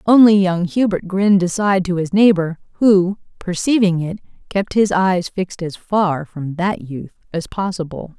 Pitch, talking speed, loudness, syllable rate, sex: 185 Hz, 160 wpm, -17 LUFS, 4.6 syllables/s, female